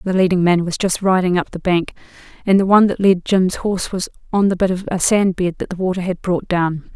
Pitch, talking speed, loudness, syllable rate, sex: 185 Hz, 260 wpm, -17 LUFS, 5.8 syllables/s, female